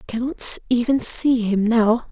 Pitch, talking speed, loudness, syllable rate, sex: 235 Hz, 170 wpm, -19 LUFS, 4.3 syllables/s, female